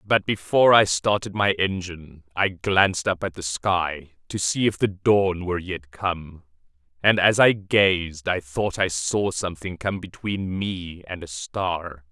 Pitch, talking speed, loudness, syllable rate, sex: 90 Hz, 175 wpm, -22 LUFS, 4.1 syllables/s, male